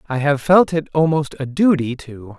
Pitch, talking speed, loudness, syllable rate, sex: 145 Hz, 200 wpm, -17 LUFS, 4.7 syllables/s, male